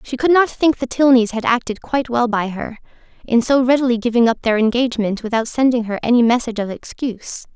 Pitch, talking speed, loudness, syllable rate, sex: 240 Hz, 205 wpm, -17 LUFS, 6.1 syllables/s, female